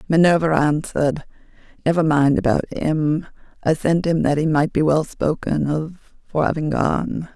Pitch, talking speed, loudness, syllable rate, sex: 155 Hz, 155 wpm, -20 LUFS, 4.5 syllables/s, female